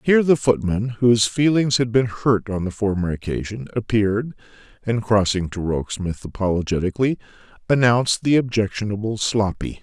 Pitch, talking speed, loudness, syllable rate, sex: 110 Hz, 135 wpm, -20 LUFS, 5.5 syllables/s, male